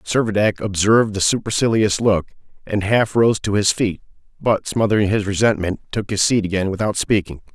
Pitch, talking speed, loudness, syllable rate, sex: 105 Hz, 165 wpm, -18 LUFS, 5.3 syllables/s, male